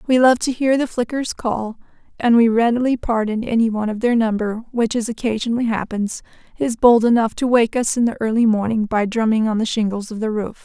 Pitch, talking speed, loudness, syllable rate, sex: 230 Hz, 215 wpm, -18 LUFS, 5.8 syllables/s, female